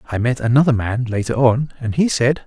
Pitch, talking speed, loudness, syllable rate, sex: 125 Hz, 220 wpm, -18 LUFS, 5.6 syllables/s, male